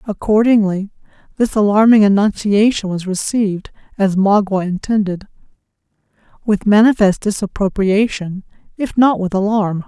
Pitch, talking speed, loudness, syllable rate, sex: 205 Hz, 95 wpm, -15 LUFS, 4.8 syllables/s, female